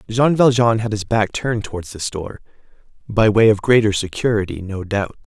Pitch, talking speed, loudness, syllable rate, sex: 105 Hz, 180 wpm, -18 LUFS, 5.3 syllables/s, male